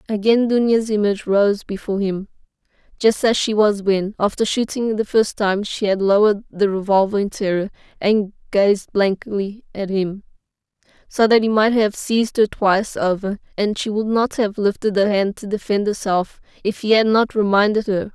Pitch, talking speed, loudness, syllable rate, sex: 205 Hz, 180 wpm, -19 LUFS, 4.9 syllables/s, female